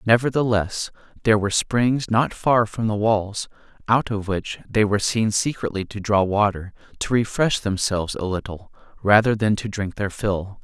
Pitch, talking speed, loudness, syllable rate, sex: 105 Hz, 170 wpm, -21 LUFS, 4.8 syllables/s, male